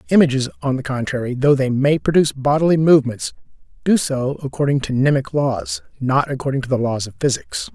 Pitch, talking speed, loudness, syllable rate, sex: 135 Hz, 180 wpm, -18 LUFS, 5.9 syllables/s, male